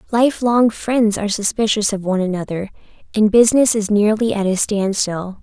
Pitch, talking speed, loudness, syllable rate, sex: 210 Hz, 155 wpm, -17 LUFS, 5.3 syllables/s, female